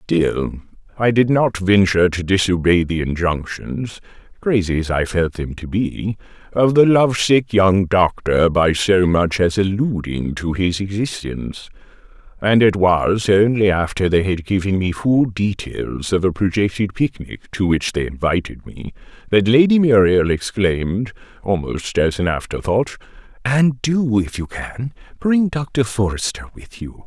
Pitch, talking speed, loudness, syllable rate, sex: 100 Hz, 145 wpm, -18 LUFS, 4.3 syllables/s, male